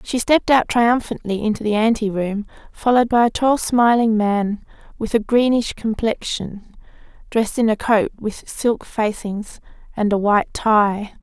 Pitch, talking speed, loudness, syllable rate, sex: 220 Hz, 155 wpm, -19 LUFS, 4.6 syllables/s, female